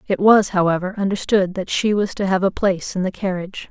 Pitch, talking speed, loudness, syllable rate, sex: 190 Hz, 225 wpm, -19 LUFS, 5.9 syllables/s, female